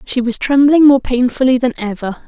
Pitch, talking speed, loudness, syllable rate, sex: 255 Hz, 185 wpm, -13 LUFS, 5.3 syllables/s, female